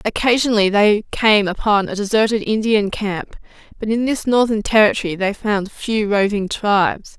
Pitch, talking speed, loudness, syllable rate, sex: 210 Hz, 150 wpm, -17 LUFS, 4.8 syllables/s, female